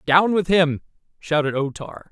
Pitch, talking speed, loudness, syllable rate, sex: 165 Hz, 170 wpm, -20 LUFS, 4.3 syllables/s, male